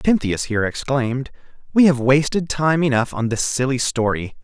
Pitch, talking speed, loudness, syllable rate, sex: 130 Hz, 160 wpm, -19 LUFS, 5.1 syllables/s, male